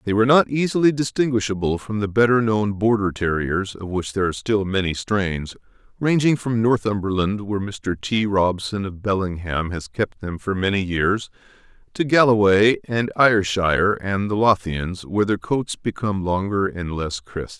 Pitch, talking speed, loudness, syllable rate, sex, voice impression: 105 Hz, 165 wpm, -21 LUFS, 4.8 syllables/s, male, very masculine, adult-like, thick, cool, intellectual, slightly refreshing